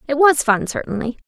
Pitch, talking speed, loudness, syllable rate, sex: 270 Hz, 190 wpm, -18 LUFS, 5.8 syllables/s, female